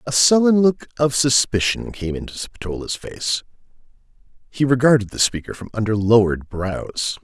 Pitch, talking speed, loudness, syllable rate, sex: 120 Hz, 140 wpm, -19 LUFS, 5.0 syllables/s, male